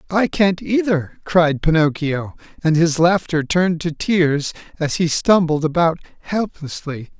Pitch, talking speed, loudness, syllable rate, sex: 165 Hz, 135 wpm, -18 LUFS, 4.1 syllables/s, male